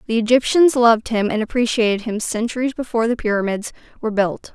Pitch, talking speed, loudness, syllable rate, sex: 230 Hz, 170 wpm, -18 LUFS, 6.3 syllables/s, female